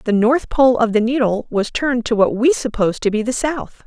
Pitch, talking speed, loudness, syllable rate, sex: 235 Hz, 250 wpm, -17 LUFS, 5.3 syllables/s, female